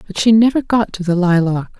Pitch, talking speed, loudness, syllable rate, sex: 200 Hz, 235 wpm, -15 LUFS, 5.6 syllables/s, female